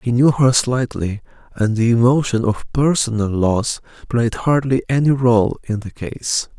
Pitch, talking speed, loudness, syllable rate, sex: 120 Hz, 155 wpm, -18 LUFS, 4.3 syllables/s, male